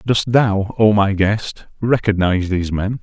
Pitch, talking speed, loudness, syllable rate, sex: 105 Hz, 160 wpm, -17 LUFS, 4.4 syllables/s, male